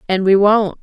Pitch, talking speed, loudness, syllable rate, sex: 200 Hz, 215 wpm, -13 LUFS, 4.6 syllables/s, female